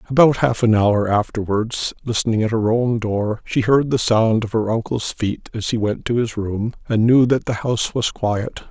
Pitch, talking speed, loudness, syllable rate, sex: 115 Hz, 215 wpm, -19 LUFS, 4.7 syllables/s, male